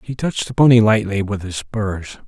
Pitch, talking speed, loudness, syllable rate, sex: 110 Hz, 210 wpm, -17 LUFS, 5.2 syllables/s, male